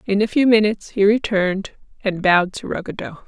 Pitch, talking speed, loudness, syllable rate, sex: 200 Hz, 185 wpm, -19 LUFS, 5.9 syllables/s, female